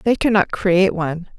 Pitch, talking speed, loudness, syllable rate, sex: 190 Hz, 175 wpm, -18 LUFS, 5.8 syllables/s, female